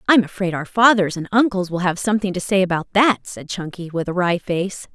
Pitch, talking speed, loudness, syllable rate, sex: 190 Hz, 245 wpm, -19 LUFS, 5.9 syllables/s, female